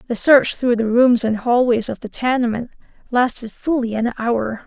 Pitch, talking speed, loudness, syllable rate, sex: 240 Hz, 180 wpm, -18 LUFS, 4.7 syllables/s, female